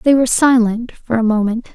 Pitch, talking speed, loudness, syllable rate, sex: 235 Hz, 205 wpm, -15 LUFS, 5.5 syllables/s, female